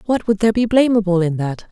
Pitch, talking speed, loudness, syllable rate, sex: 205 Hz, 245 wpm, -16 LUFS, 6.4 syllables/s, female